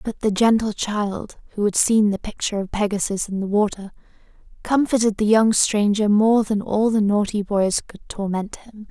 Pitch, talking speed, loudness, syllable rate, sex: 210 Hz, 180 wpm, -20 LUFS, 4.8 syllables/s, female